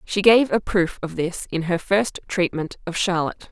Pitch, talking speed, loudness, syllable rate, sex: 185 Hz, 205 wpm, -21 LUFS, 4.7 syllables/s, female